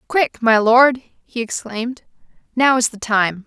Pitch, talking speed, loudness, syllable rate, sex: 235 Hz, 155 wpm, -17 LUFS, 4.2 syllables/s, female